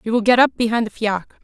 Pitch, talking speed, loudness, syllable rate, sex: 225 Hz, 295 wpm, -18 LUFS, 7.6 syllables/s, female